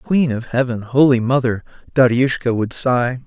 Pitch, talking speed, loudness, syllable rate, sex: 125 Hz, 145 wpm, -17 LUFS, 4.5 syllables/s, male